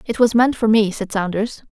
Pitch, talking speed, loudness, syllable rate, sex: 215 Hz, 245 wpm, -18 LUFS, 5.2 syllables/s, female